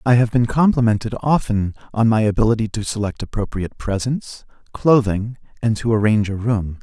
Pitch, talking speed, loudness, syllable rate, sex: 110 Hz, 160 wpm, -19 LUFS, 5.5 syllables/s, male